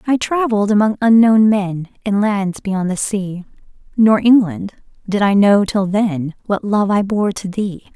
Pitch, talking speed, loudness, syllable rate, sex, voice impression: 205 Hz, 175 wpm, -16 LUFS, 4.0 syllables/s, female, very feminine, slightly young, slightly adult-like, very thin, relaxed, weak, bright, very soft, clear, slightly fluent, very cute, very intellectual, refreshing, very sincere, very calm, very friendly, very reassuring, unique, very elegant, very sweet, slightly lively, very kind, very modest, light